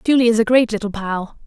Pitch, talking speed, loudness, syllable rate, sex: 220 Hz, 245 wpm, -17 LUFS, 6.2 syllables/s, female